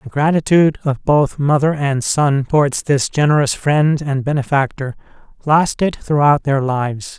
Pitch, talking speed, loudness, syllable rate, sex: 145 Hz, 140 wpm, -16 LUFS, 4.6 syllables/s, male